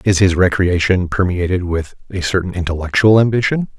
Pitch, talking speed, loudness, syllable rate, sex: 95 Hz, 145 wpm, -16 LUFS, 5.4 syllables/s, male